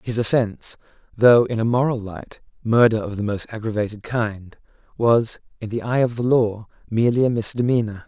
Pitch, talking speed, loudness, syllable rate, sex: 115 Hz, 170 wpm, -20 LUFS, 5.3 syllables/s, male